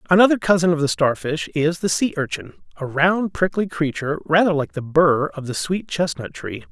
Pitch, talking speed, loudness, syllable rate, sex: 155 Hz, 195 wpm, -20 LUFS, 5.2 syllables/s, male